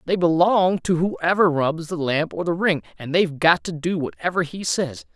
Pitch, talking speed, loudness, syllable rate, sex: 165 Hz, 210 wpm, -21 LUFS, 4.7 syllables/s, male